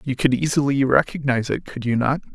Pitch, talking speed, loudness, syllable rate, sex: 130 Hz, 205 wpm, -21 LUFS, 6.1 syllables/s, male